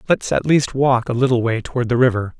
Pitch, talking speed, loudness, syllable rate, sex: 125 Hz, 250 wpm, -18 LUFS, 5.9 syllables/s, male